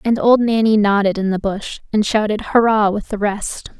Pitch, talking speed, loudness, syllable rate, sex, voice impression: 210 Hz, 205 wpm, -17 LUFS, 4.8 syllables/s, female, very feminine, young, slightly thin, slightly tensed, slightly powerful, bright, soft, clear, slightly fluent, slightly raspy, very cute, intellectual, very refreshing, sincere, calm, very friendly, very reassuring, unique, very elegant, sweet, lively, kind, light